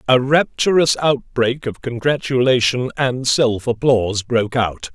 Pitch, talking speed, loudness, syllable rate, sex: 125 Hz, 120 wpm, -17 LUFS, 4.3 syllables/s, male